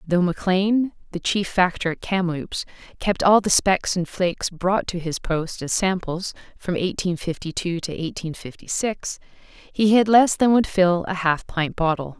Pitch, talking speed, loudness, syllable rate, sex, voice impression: 185 Hz, 180 wpm, -22 LUFS, 4.2 syllables/s, female, feminine, adult-like, tensed, slightly bright, slightly hard, clear, fluent, intellectual, calm, elegant, slightly strict, slightly sharp